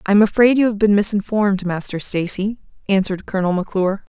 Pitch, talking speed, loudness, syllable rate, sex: 200 Hz, 160 wpm, -18 LUFS, 6.5 syllables/s, female